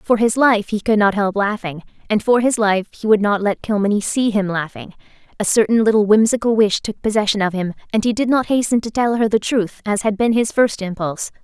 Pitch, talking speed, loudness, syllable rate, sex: 215 Hz, 235 wpm, -17 LUFS, 5.6 syllables/s, female